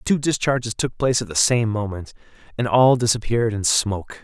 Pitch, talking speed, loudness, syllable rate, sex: 115 Hz, 200 wpm, -20 LUFS, 6.0 syllables/s, male